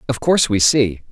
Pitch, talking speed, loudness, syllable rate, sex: 115 Hz, 215 wpm, -15 LUFS, 5.6 syllables/s, male